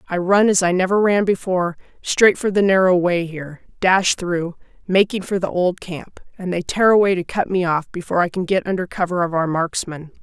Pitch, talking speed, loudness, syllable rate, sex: 180 Hz, 215 wpm, -18 LUFS, 5.3 syllables/s, female